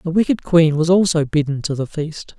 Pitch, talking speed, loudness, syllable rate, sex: 160 Hz, 225 wpm, -17 LUFS, 5.1 syllables/s, male